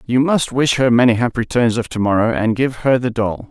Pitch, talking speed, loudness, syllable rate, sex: 120 Hz, 255 wpm, -16 LUFS, 5.7 syllables/s, male